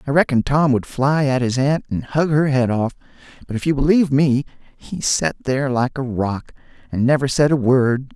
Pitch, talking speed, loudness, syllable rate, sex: 135 Hz, 215 wpm, -18 LUFS, 5.2 syllables/s, male